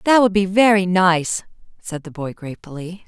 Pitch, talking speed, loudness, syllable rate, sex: 185 Hz, 175 wpm, -17 LUFS, 5.0 syllables/s, female